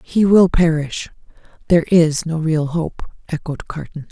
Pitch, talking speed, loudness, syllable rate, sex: 165 Hz, 145 wpm, -17 LUFS, 4.4 syllables/s, female